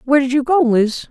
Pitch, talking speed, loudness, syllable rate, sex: 265 Hz, 270 wpm, -15 LUFS, 6.1 syllables/s, female